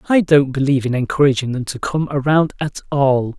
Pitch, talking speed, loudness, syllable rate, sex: 140 Hz, 195 wpm, -17 LUFS, 5.7 syllables/s, male